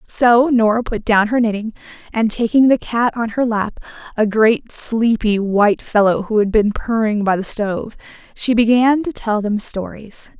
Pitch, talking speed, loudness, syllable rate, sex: 220 Hz, 180 wpm, -16 LUFS, 4.5 syllables/s, female